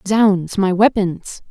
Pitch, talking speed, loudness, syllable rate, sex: 195 Hz, 120 wpm, -16 LUFS, 3.1 syllables/s, female